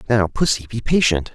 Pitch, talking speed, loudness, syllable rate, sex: 110 Hz, 180 wpm, -19 LUFS, 5.3 syllables/s, male